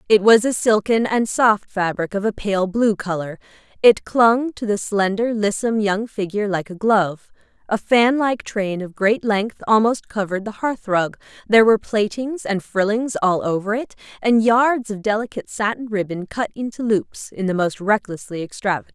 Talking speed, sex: 185 wpm, female